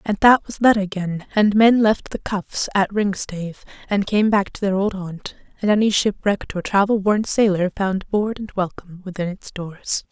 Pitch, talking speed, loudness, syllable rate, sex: 200 Hz, 195 wpm, -20 LUFS, 4.8 syllables/s, female